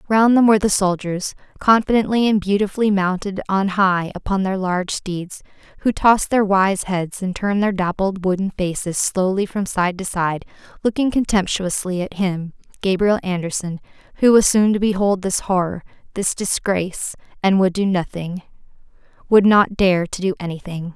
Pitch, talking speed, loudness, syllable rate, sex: 190 Hz, 160 wpm, -19 LUFS, 5.0 syllables/s, female